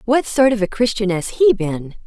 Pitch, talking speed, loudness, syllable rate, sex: 215 Hz, 235 wpm, -17 LUFS, 4.8 syllables/s, female